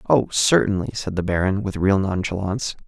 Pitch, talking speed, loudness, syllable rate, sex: 100 Hz, 165 wpm, -21 LUFS, 5.6 syllables/s, male